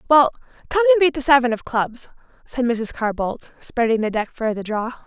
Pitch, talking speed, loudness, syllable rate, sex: 250 Hz, 215 wpm, -20 LUFS, 5.2 syllables/s, female